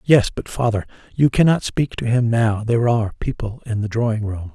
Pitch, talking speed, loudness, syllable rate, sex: 115 Hz, 210 wpm, -20 LUFS, 5.5 syllables/s, male